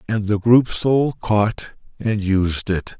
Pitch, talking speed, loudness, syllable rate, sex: 105 Hz, 160 wpm, -19 LUFS, 3.1 syllables/s, male